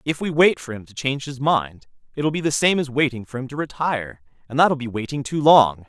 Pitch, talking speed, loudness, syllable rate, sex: 140 Hz, 255 wpm, -20 LUFS, 5.7 syllables/s, male